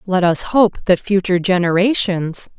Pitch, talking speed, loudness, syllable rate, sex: 185 Hz, 140 wpm, -16 LUFS, 4.8 syllables/s, female